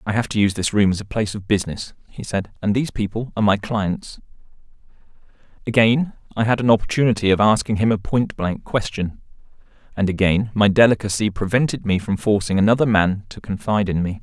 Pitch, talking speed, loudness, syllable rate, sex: 105 Hz, 190 wpm, -20 LUFS, 6.3 syllables/s, male